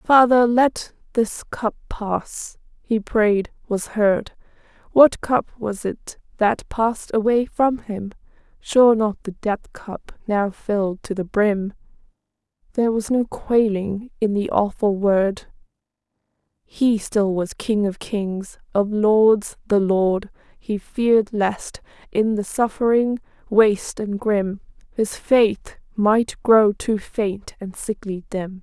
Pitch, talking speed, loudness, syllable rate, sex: 215 Hz, 130 wpm, -20 LUFS, 3.4 syllables/s, female